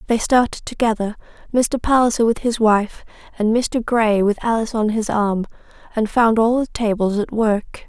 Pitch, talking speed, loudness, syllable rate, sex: 225 Hz, 175 wpm, -18 LUFS, 4.8 syllables/s, female